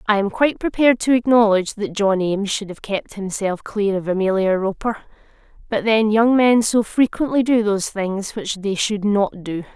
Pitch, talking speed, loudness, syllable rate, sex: 210 Hz, 190 wpm, -19 LUFS, 5.1 syllables/s, female